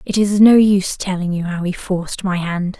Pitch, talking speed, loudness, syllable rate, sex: 185 Hz, 235 wpm, -16 LUFS, 5.2 syllables/s, female